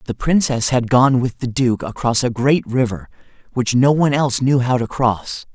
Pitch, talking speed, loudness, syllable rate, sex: 125 Hz, 205 wpm, -17 LUFS, 4.9 syllables/s, male